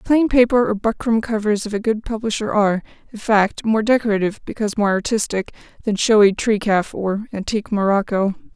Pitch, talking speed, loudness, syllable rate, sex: 215 Hz, 175 wpm, -19 LUFS, 5.8 syllables/s, female